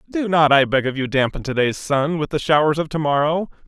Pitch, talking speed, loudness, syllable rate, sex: 150 Hz, 230 wpm, -19 LUFS, 5.8 syllables/s, male